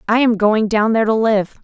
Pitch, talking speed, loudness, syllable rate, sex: 220 Hz, 255 wpm, -15 LUFS, 5.6 syllables/s, female